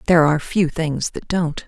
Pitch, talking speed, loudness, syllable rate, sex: 160 Hz, 215 wpm, -20 LUFS, 5.4 syllables/s, female